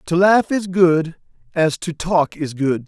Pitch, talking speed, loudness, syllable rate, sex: 170 Hz, 190 wpm, -18 LUFS, 3.7 syllables/s, male